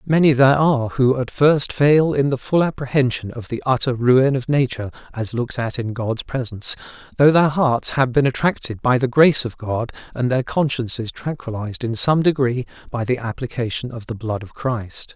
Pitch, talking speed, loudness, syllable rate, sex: 125 Hz, 195 wpm, -19 LUFS, 5.3 syllables/s, male